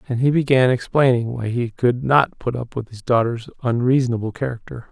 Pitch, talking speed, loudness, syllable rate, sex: 125 Hz, 185 wpm, -20 LUFS, 5.4 syllables/s, male